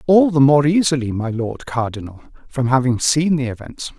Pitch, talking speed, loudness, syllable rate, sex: 135 Hz, 180 wpm, -17 LUFS, 5.0 syllables/s, male